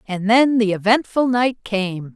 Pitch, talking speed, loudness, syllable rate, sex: 220 Hz, 165 wpm, -18 LUFS, 4.1 syllables/s, female